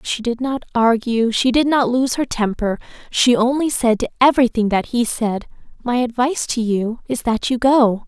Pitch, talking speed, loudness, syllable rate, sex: 240 Hz, 195 wpm, -18 LUFS, 4.9 syllables/s, female